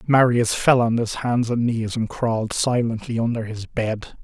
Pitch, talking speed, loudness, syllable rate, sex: 115 Hz, 185 wpm, -21 LUFS, 4.5 syllables/s, male